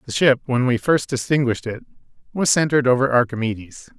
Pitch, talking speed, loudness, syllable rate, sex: 130 Hz, 165 wpm, -19 LUFS, 6.2 syllables/s, male